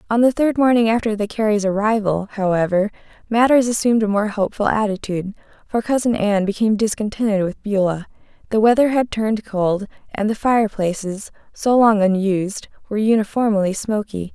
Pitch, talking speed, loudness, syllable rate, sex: 210 Hz, 150 wpm, -19 LUFS, 5.7 syllables/s, female